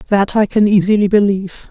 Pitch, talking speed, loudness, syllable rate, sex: 200 Hz, 175 wpm, -13 LUFS, 6.1 syllables/s, female